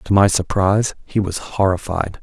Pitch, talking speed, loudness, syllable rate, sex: 95 Hz, 160 wpm, -18 LUFS, 5.0 syllables/s, male